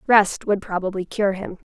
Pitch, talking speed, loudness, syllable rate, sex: 195 Hz, 175 wpm, -22 LUFS, 4.7 syllables/s, female